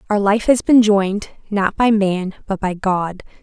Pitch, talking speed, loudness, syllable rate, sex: 200 Hz, 190 wpm, -17 LUFS, 4.3 syllables/s, female